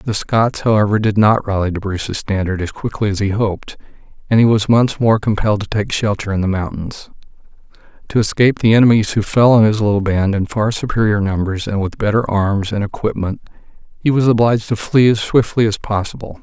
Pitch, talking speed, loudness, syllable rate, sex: 105 Hz, 200 wpm, -16 LUFS, 5.7 syllables/s, male